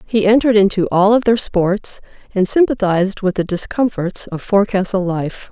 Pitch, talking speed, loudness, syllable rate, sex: 200 Hz, 165 wpm, -16 LUFS, 5.1 syllables/s, female